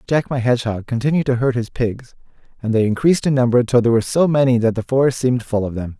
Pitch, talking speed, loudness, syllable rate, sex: 125 Hz, 250 wpm, -18 LUFS, 6.9 syllables/s, male